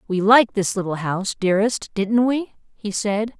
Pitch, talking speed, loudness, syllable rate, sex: 210 Hz, 175 wpm, -20 LUFS, 5.1 syllables/s, female